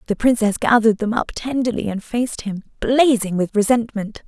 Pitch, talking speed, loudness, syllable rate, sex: 225 Hz, 170 wpm, -19 LUFS, 5.4 syllables/s, female